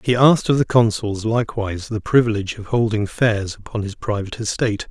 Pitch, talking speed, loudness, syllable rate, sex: 110 Hz, 185 wpm, -19 LUFS, 6.1 syllables/s, male